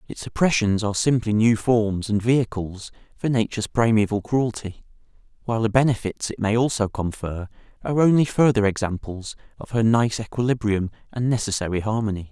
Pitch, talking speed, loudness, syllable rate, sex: 110 Hz, 145 wpm, -22 LUFS, 5.6 syllables/s, male